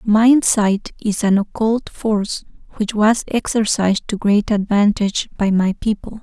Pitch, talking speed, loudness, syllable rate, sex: 210 Hz, 145 wpm, -17 LUFS, 4.3 syllables/s, female